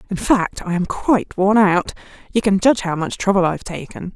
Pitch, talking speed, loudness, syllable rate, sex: 195 Hz, 230 wpm, -18 LUFS, 5.7 syllables/s, female